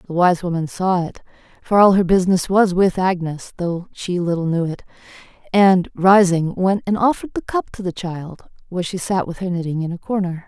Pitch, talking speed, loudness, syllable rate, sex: 180 Hz, 205 wpm, -19 LUFS, 5.3 syllables/s, female